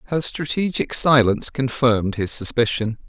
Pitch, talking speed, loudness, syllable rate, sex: 125 Hz, 115 wpm, -19 LUFS, 5.1 syllables/s, male